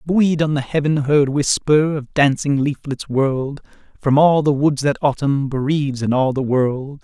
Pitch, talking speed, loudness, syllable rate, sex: 140 Hz, 180 wpm, -18 LUFS, 4.5 syllables/s, male